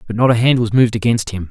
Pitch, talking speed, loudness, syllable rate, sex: 115 Hz, 320 wpm, -15 LUFS, 7.3 syllables/s, male